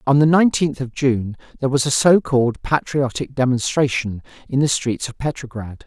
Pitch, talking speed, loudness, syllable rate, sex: 135 Hz, 165 wpm, -19 LUFS, 5.3 syllables/s, male